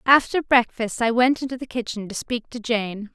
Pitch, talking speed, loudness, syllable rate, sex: 235 Hz, 210 wpm, -22 LUFS, 5.1 syllables/s, female